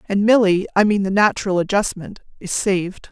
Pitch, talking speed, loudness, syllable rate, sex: 195 Hz, 135 wpm, -18 LUFS, 5.7 syllables/s, female